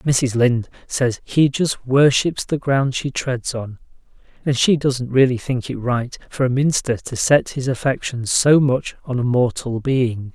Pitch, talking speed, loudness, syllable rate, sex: 130 Hz, 180 wpm, -19 LUFS, 4.2 syllables/s, male